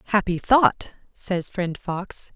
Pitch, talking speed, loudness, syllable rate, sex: 195 Hz, 125 wpm, -22 LUFS, 3.1 syllables/s, female